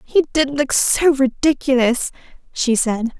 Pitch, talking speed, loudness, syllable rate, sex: 265 Hz, 130 wpm, -17 LUFS, 3.9 syllables/s, female